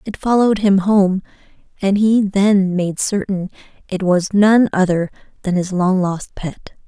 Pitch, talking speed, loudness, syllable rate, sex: 195 Hz, 155 wpm, -16 LUFS, 4.2 syllables/s, female